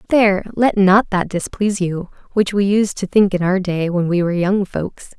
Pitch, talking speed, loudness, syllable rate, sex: 190 Hz, 220 wpm, -17 LUFS, 5.0 syllables/s, female